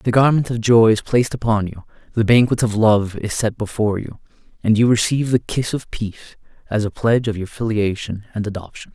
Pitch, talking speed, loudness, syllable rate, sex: 110 Hz, 210 wpm, -18 LUFS, 5.9 syllables/s, male